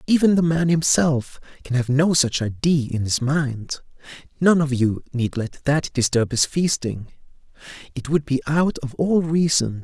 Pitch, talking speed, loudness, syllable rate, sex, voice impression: 140 Hz, 170 wpm, -20 LUFS, 4.3 syllables/s, male, masculine, adult-like, slightly fluent, cool, slightly refreshing, sincere, slightly calm